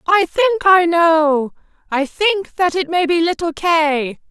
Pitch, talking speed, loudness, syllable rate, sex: 335 Hz, 165 wpm, -15 LUFS, 3.5 syllables/s, female